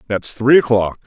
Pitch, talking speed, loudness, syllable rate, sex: 115 Hz, 170 wpm, -15 LUFS, 4.8 syllables/s, male